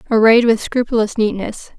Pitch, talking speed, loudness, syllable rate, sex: 225 Hz, 135 wpm, -15 LUFS, 5.3 syllables/s, female